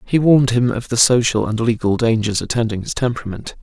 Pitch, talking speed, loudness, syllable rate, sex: 115 Hz, 200 wpm, -17 LUFS, 6.0 syllables/s, male